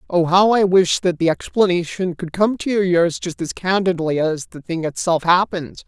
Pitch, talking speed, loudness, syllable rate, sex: 180 Hz, 205 wpm, -18 LUFS, 5.0 syllables/s, male